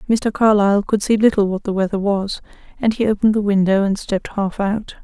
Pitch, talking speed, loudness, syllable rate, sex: 205 Hz, 215 wpm, -18 LUFS, 5.9 syllables/s, female